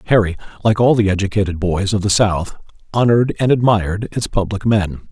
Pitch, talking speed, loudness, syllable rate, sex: 100 Hz, 175 wpm, -17 LUFS, 5.8 syllables/s, male